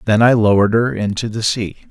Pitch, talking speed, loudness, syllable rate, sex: 110 Hz, 220 wpm, -15 LUFS, 6.1 syllables/s, male